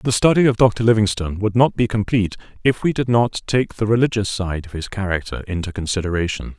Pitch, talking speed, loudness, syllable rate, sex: 105 Hz, 200 wpm, -19 LUFS, 5.9 syllables/s, male